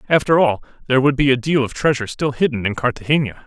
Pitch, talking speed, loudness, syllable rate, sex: 135 Hz, 225 wpm, -18 LUFS, 6.9 syllables/s, male